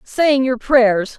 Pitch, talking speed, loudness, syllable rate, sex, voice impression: 250 Hz, 150 wpm, -15 LUFS, 2.8 syllables/s, female, very feminine, adult-like, thin, tensed, slightly powerful, bright, hard, clear, fluent, slightly raspy, slightly cute, intellectual, very refreshing, sincere, calm, friendly, reassuring, unique, slightly elegant, wild, slightly sweet, lively, strict, slightly intense, sharp